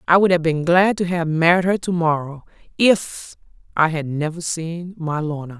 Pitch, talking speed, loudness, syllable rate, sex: 165 Hz, 195 wpm, -19 LUFS, 4.7 syllables/s, female